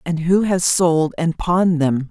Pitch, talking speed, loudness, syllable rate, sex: 170 Hz, 200 wpm, -17 LUFS, 4.0 syllables/s, female